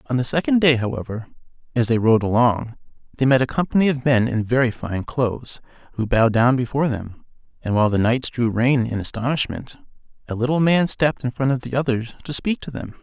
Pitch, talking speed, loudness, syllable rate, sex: 125 Hz, 205 wpm, -20 LUFS, 5.9 syllables/s, male